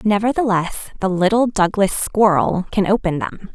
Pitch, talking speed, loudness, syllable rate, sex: 200 Hz, 135 wpm, -18 LUFS, 4.8 syllables/s, female